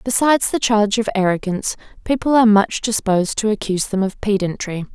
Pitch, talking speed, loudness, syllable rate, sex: 210 Hz, 170 wpm, -18 LUFS, 6.3 syllables/s, female